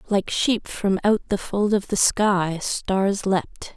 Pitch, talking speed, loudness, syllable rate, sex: 200 Hz, 175 wpm, -22 LUFS, 3.2 syllables/s, female